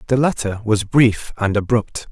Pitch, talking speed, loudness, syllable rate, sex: 110 Hz, 170 wpm, -18 LUFS, 4.4 syllables/s, male